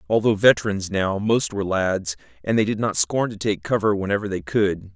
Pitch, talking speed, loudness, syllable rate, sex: 100 Hz, 205 wpm, -22 LUFS, 5.3 syllables/s, male